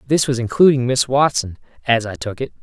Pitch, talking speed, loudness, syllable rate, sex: 125 Hz, 205 wpm, -17 LUFS, 5.8 syllables/s, male